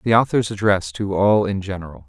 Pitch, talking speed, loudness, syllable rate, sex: 95 Hz, 200 wpm, -19 LUFS, 5.6 syllables/s, male